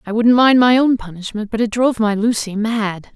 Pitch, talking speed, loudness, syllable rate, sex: 220 Hz, 230 wpm, -16 LUFS, 5.3 syllables/s, female